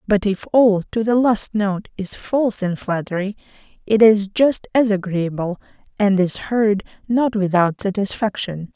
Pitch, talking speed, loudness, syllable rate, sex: 205 Hz, 150 wpm, -19 LUFS, 4.3 syllables/s, female